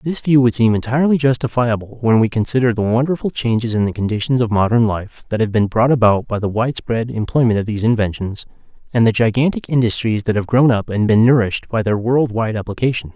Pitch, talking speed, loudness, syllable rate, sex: 115 Hz, 210 wpm, -17 LUFS, 6.1 syllables/s, male